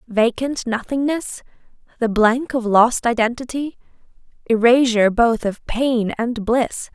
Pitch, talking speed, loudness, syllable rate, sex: 240 Hz, 110 wpm, -18 LUFS, 4.0 syllables/s, female